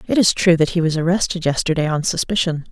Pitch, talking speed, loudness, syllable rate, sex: 170 Hz, 220 wpm, -18 LUFS, 6.3 syllables/s, female